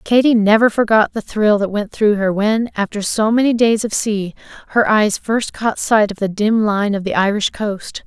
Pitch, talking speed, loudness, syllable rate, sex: 210 Hz, 215 wpm, -16 LUFS, 4.6 syllables/s, female